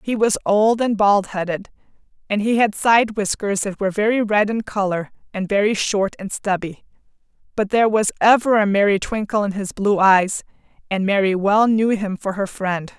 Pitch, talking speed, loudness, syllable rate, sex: 205 Hz, 190 wpm, -19 LUFS, 4.9 syllables/s, female